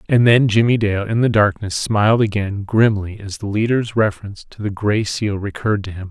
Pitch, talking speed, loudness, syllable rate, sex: 105 Hz, 205 wpm, -18 LUFS, 5.4 syllables/s, male